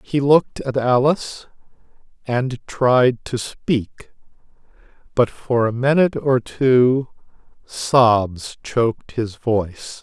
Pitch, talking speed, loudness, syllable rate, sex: 120 Hz, 110 wpm, -19 LUFS, 3.3 syllables/s, male